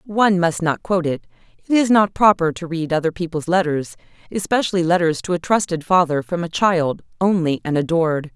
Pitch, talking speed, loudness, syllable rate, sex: 170 Hz, 180 wpm, -19 LUFS, 5.6 syllables/s, female